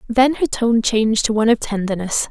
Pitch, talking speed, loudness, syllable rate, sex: 225 Hz, 210 wpm, -17 LUFS, 5.6 syllables/s, female